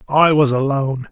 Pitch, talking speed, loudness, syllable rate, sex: 140 Hz, 160 wpm, -16 LUFS, 5.7 syllables/s, male